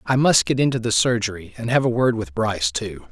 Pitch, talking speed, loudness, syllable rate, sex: 115 Hz, 230 wpm, -20 LUFS, 5.8 syllables/s, male